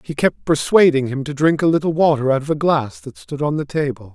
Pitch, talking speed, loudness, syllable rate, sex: 145 Hz, 260 wpm, -18 LUFS, 5.7 syllables/s, male